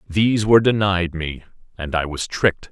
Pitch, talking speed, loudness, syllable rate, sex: 95 Hz, 175 wpm, -19 LUFS, 5.4 syllables/s, male